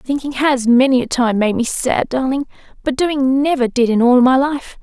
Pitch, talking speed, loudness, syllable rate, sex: 260 Hz, 210 wpm, -15 LUFS, 4.7 syllables/s, female